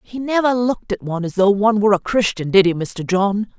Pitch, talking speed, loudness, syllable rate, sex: 205 Hz, 250 wpm, -18 LUFS, 6.1 syllables/s, female